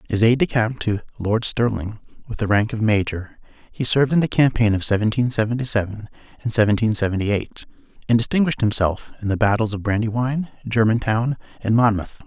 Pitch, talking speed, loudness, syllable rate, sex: 110 Hz, 175 wpm, -20 LUFS, 5.9 syllables/s, male